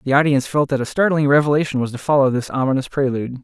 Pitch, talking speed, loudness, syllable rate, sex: 135 Hz, 225 wpm, -18 LUFS, 7.3 syllables/s, male